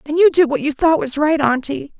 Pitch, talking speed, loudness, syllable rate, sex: 285 Hz, 270 wpm, -16 LUFS, 5.4 syllables/s, female